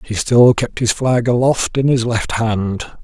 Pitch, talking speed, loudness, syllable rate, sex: 115 Hz, 195 wpm, -15 LUFS, 4.0 syllables/s, male